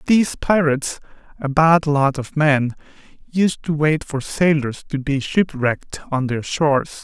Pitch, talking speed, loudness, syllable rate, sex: 150 Hz, 155 wpm, -19 LUFS, 4.4 syllables/s, male